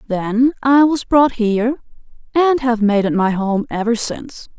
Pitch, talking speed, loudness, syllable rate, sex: 240 Hz, 170 wpm, -16 LUFS, 4.5 syllables/s, female